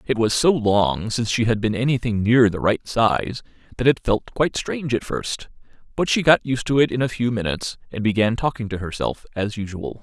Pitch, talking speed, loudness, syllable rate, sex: 115 Hz, 220 wpm, -21 LUFS, 5.5 syllables/s, male